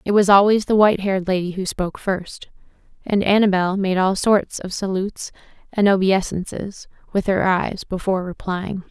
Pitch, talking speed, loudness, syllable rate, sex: 190 Hz, 160 wpm, -19 LUFS, 5.2 syllables/s, female